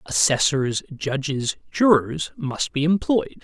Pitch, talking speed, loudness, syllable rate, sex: 140 Hz, 105 wpm, -22 LUFS, 3.7 syllables/s, male